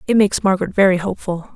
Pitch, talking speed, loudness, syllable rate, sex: 190 Hz, 195 wpm, -17 LUFS, 7.8 syllables/s, female